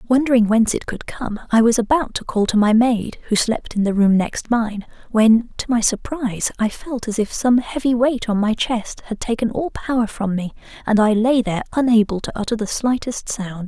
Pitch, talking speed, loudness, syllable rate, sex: 225 Hz, 220 wpm, -19 LUFS, 5.2 syllables/s, female